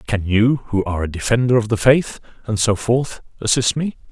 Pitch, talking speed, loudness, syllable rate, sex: 115 Hz, 205 wpm, -18 LUFS, 5.2 syllables/s, male